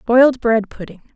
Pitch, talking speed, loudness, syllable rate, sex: 235 Hz, 155 wpm, -15 LUFS, 5.4 syllables/s, female